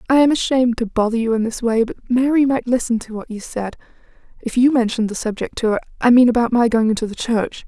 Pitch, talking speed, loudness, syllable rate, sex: 235 Hz, 240 wpm, -18 LUFS, 6.5 syllables/s, female